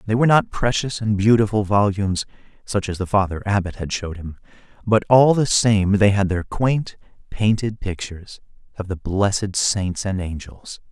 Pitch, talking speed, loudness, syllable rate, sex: 100 Hz, 170 wpm, -20 LUFS, 5.0 syllables/s, male